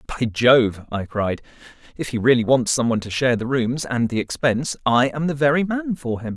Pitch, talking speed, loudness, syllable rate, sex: 125 Hz, 215 wpm, -20 LUFS, 5.7 syllables/s, male